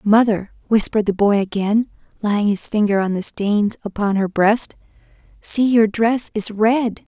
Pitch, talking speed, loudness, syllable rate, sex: 210 Hz, 160 wpm, -18 LUFS, 4.3 syllables/s, female